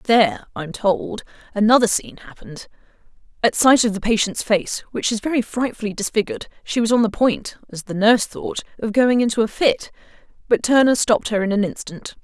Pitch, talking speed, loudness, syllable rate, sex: 220 Hz, 185 wpm, -19 LUFS, 5.6 syllables/s, female